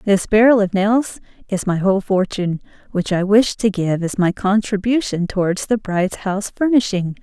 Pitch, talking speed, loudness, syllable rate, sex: 200 Hz, 175 wpm, -18 LUFS, 5.1 syllables/s, female